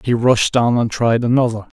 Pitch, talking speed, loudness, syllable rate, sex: 120 Hz, 200 wpm, -16 LUFS, 5.0 syllables/s, male